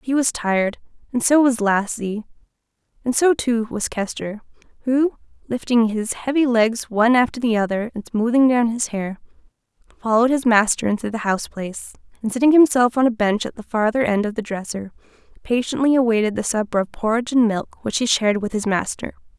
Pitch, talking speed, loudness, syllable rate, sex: 230 Hz, 185 wpm, -20 LUFS, 5.7 syllables/s, female